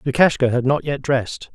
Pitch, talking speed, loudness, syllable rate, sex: 135 Hz, 195 wpm, -19 LUFS, 5.5 syllables/s, male